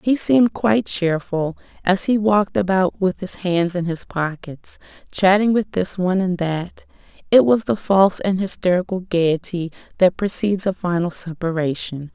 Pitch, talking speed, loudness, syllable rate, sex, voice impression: 185 Hz, 160 wpm, -19 LUFS, 4.8 syllables/s, female, very feminine, middle-aged, thin, slightly relaxed, slightly weak, bright, soft, clear, slightly fluent, slightly raspy, cute, slightly cool, intellectual, refreshing, very sincere, very calm, friendly, very reassuring, unique, very elegant, slightly wild, sweet, lively, very kind, slightly modest